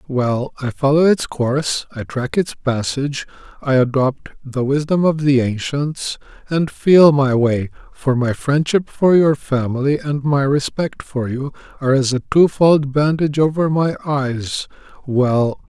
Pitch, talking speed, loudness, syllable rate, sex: 140 Hz, 150 wpm, -17 LUFS, 4.2 syllables/s, male